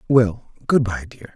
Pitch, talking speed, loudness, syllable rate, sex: 115 Hz, 175 wpm, -20 LUFS, 4.4 syllables/s, male